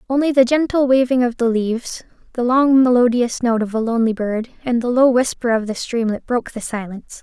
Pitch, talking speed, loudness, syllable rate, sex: 245 Hz, 205 wpm, -17 LUFS, 5.7 syllables/s, female